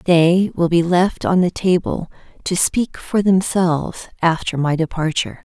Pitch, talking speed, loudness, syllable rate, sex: 175 Hz, 150 wpm, -18 LUFS, 4.4 syllables/s, female